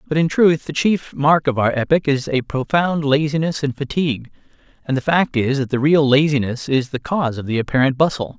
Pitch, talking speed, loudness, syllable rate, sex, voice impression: 145 Hz, 215 wpm, -18 LUFS, 5.5 syllables/s, male, masculine, middle-aged, tensed, powerful, bright, clear, cool, intellectual, friendly, reassuring, unique, wild, lively, kind